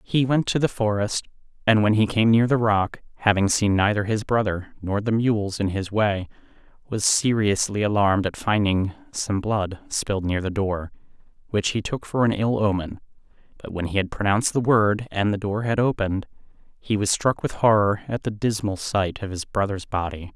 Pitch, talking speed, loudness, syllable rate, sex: 105 Hz, 195 wpm, -23 LUFS, 5.0 syllables/s, male